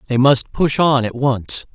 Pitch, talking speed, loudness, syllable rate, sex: 130 Hz, 205 wpm, -16 LUFS, 4.1 syllables/s, male